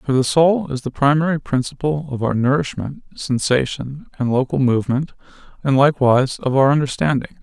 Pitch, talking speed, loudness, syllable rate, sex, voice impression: 135 Hz, 155 wpm, -18 LUFS, 5.5 syllables/s, male, masculine, adult-like, relaxed, weak, slightly dark, muffled, calm, friendly, reassuring, kind, modest